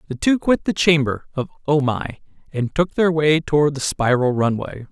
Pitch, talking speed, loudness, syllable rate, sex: 145 Hz, 195 wpm, -19 LUFS, 4.8 syllables/s, male